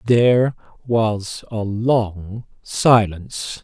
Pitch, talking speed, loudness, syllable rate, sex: 110 Hz, 80 wpm, -19 LUFS, 2.7 syllables/s, male